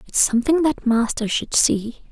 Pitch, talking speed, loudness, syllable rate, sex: 250 Hz, 170 wpm, -19 LUFS, 4.9 syllables/s, female